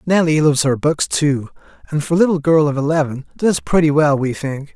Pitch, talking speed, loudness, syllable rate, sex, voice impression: 150 Hz, 215 wpm, -16 LUFS, 5.5 syllables/s, male, masculine, adult-like, slightly soft, refreshing, sincere